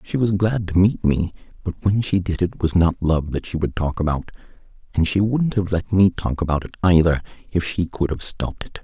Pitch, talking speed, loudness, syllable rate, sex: 90 Hz, 240 wpm, -21 LUFS, 5.4 syllables/s, male